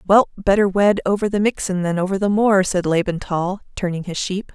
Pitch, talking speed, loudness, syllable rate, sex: 190 Hz, 210 wpm, -19 LUFS, 5.3 syllables/s, female